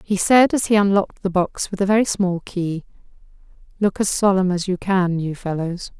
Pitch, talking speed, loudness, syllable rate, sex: 190 Hz, 200 wpm, -19 LUFS, 5.1 syllables/s, female